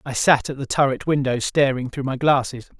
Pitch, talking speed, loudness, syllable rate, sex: 135 Hz, 215 wpm, -20 LUFS, 5.3 syllables/s, male